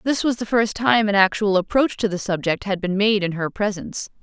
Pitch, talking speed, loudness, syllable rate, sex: 205 Hz, 240 wpm, -20 LUFS, 5.5 syllables/s, female